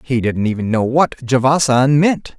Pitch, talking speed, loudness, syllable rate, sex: 130 Hz, 175 wpm, -15 LUFS, 4.4 syllables/s, male